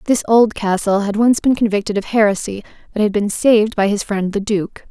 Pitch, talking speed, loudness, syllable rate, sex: 210 Hz, 210 wpm, -16 LUFS, 5.5 syllables/s, female